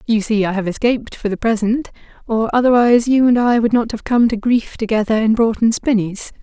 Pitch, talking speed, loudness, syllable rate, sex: 225 Hz, 205 wpm, -16 LUFS, 5.7 syllables/s, female